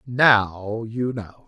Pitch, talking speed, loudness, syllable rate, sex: 115 Hz, 120 wpm, -21 LUFS, 2.2 syllables/s, male